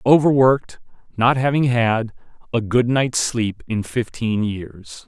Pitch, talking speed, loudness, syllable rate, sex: 120 Hz, 130 wpm, -19 LUFS, 3.9 syllables/s, male